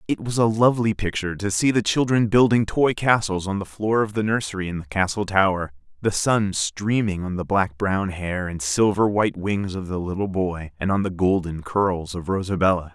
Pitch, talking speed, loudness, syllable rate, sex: 100 Hz, 210 wpm, -22 LUFS, 5.1 syllables/s, male